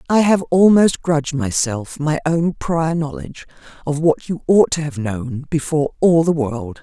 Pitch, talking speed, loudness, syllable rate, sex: 150 Hz, 175 wpm, -17 LUFS, 4.5 syllables/s, female